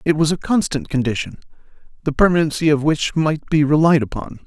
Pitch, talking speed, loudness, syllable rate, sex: 155 Hz, 175 wpm, -18 LUFS, 5.8 syllables/s, male